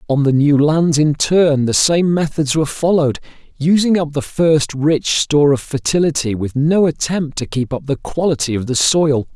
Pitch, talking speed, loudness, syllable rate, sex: 150 Hz, 190 wpm, -15 LUFS, 4.8 syllables/s, male